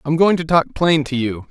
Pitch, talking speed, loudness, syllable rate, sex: 150 Hz, 280 wpm, -17 LUFS, 5.0 syllables/s, male